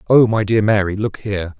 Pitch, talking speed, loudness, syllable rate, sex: 105 Hz, 225 wpm, -17 LUFS, 5.8 syllables/s, male